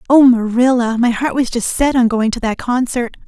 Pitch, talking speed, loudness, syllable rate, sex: 240 Hz, 220 wpm, -15 LUFS, 5.1 syllables/s, female